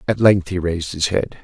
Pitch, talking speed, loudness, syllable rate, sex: 90 Hz, 250 wpm, -19 LUFS, 5.7 syllables/s, male